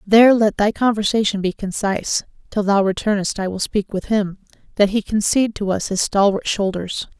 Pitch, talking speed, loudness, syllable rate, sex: 205 Hz, 185 wpm, -19 LUFS, 5.4 syllables/s, female